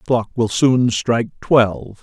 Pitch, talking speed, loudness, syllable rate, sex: 115 Hz, 180 wpm, -17 LUFS, 4.6 syllables/s, male